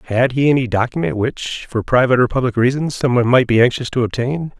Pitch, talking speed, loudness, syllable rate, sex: 125 Hz, 210 wpm, -16 LUFS, 6.2 syllables/s, male